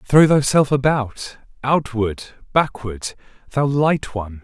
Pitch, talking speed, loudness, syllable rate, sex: 130 Hz, 95 wpm, -19 LUFS, 3.8 syllables/s, male